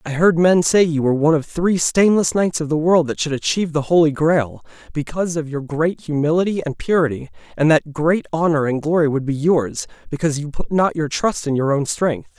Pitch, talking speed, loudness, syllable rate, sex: 155 Hz, 225 wpm, -18 LUFS, 5.6 syllables/s, male